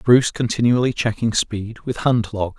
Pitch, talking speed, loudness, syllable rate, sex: 115 Hz, 160 wpm, -20 LUFS, 4.9 syllables/s, male